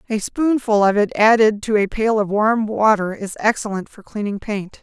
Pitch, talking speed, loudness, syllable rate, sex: 210 Hz, 200 wpm, -18 LUFS, 4.8 syllables/s, female